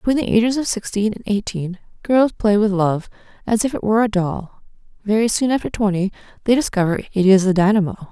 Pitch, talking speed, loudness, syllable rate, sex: 205 Hz, 200 wpm, -18 LUFS, 5.9 syllables/s, female